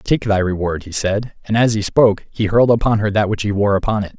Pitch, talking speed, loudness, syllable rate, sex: 105 Hz, 270 wpm, -17 LUFS, 6.0 syllables/s, male